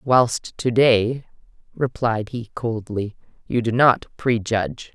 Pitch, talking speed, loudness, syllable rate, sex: 115 Hz, 120 wpm, -21 LUFS, 3.5 syllables/s, female